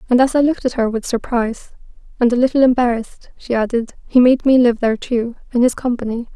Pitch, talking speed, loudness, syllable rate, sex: 240 Hz, 215 wpm, -17 LUFS, 6.4 syllables/s, female